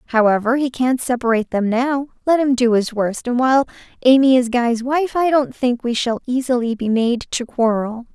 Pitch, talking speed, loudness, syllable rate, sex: 250 Hz, 200 wpm, -18 LUFS, 5.2 syllables/s, female